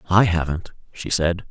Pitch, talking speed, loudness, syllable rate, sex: 85 Hz, 160 wpm, -21 LUFS, 4.7 syllables/s, male